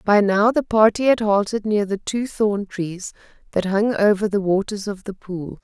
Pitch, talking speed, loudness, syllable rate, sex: 205 Hz, 200 wpm, -20 LUFS, 4.5 syllables/s, female